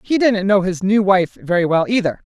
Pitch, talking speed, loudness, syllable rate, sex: 190 Hz, 235 wpm, -16 LUFS, 5.2 syllables/s, female